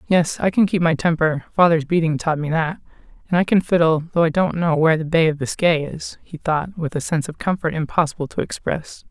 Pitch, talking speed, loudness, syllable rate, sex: 165 Hz, 230 wpm, -19 LUFS, 5.8 syllables/s, female